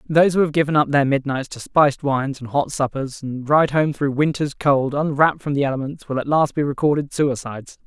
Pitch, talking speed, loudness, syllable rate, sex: 140 Hz, 220 wpm, -20 LUFS, 5.7 syllables/s, male